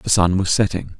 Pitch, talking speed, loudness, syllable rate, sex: 95 Hz, 240 wpm, -18 LUFS, 5.3 syllables/s, male